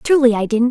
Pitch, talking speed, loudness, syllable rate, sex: 245 Hz, 255 wpm, -15 LUFS, 6.1 syllables/s, female